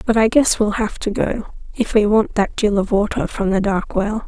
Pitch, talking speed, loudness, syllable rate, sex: 210 Hz, 250 wpm, -18 LUFS, 4.9 syllables/s, female